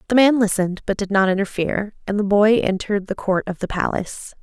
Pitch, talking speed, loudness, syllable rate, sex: 200 Hz, 215 wpm, -20 LUFS, 6.3 syllables/s, female